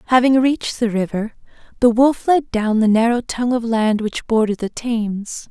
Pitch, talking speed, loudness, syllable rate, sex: 230 Hz, 185 wpm, -18 LUFS, 5.2 syllables/s, female